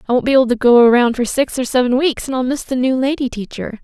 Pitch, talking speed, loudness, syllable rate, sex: 250 Hz, 295 wpm, -15 LUFS, 6.6 syllables/s, female